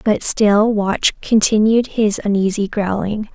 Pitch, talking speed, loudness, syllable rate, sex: 210 Hz, 125 wpm, -16 LUFS, 3.8 syllables/s, female